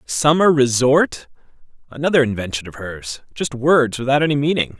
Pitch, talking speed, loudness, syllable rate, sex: 130 Hz, 115 wpm, -17 LUFS, 5.0 syllables/s, male